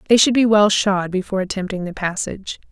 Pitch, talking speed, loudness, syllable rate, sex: 200 Hz, 200 wpm, -18 LUFS, 6.2 syllables/s, female